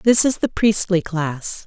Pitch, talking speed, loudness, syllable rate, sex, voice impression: 185 Hz, 180 wpm, -19 LUFS, 3.2 syllables/s, female, feminine, very adult-like, very middle-aged, slightly thin, tensed, slightly powerful, slightly bright, slightly soft, clear, fluent, slightly cool, slightly intellectual, refreshing, sincere, calm, friendly, slightly reassuring, slightly elegant, slightly lively, slightly strict, slightly intense, slightly modest